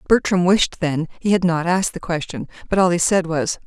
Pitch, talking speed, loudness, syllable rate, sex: 175 Hz, 230 wpm, -19 LUFS, 5.4 syllables/s, female